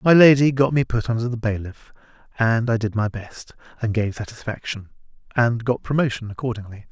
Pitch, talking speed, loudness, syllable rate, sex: 115 Hz, 175 wpm, -21 LUFS, 5.5 syllables/s, male